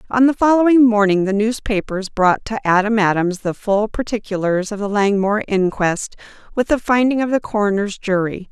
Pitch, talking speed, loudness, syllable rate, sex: 210 Hz, 170 wpm, -17 LUFS, 5.2 syllables/s, female